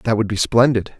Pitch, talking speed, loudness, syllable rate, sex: 110 Hz, 240 wpm, -17 LUFS, 5.3 syllables/s, male